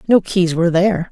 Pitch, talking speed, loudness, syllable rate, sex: 180 Hz, 215 wpm, -15 LUFS, 6.3 syllables/s, female